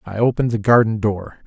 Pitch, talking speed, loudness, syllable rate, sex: 110 Hz, 205 wpm, -17 LUFS, 6.0 syllables/s, male